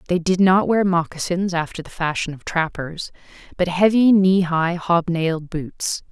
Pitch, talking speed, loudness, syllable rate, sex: 175 Hz, 155 wpm, -19 LUFS, 4.4 syllables/s, female